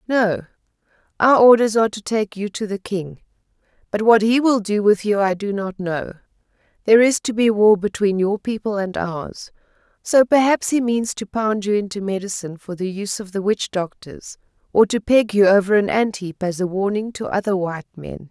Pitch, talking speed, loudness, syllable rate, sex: 205 Hz, 205 wpm, -19 LUFS, 5.2 syllables/s, female